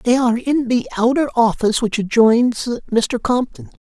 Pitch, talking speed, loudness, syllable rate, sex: 235 Hz, 155 wpm, -17 LUFS, 4.8 syllables/s, male